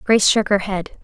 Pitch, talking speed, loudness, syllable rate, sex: 200 Hz, 230 wpm, -17 LUFS, 5.4 syllables/s, female